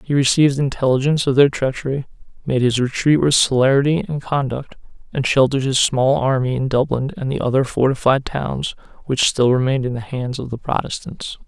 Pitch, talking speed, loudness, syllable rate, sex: 135 Hz, 180 wpm, -18 LUFS, 5.7 syllables/s, male